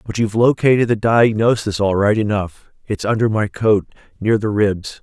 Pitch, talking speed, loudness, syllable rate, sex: 105 Hz, 165 wpm, -17 LUFS, 5.0 syllables/s, male